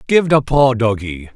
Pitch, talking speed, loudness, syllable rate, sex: 125 Hz, 175 wpm, -15 LUFS, 4.4 syllables/s, male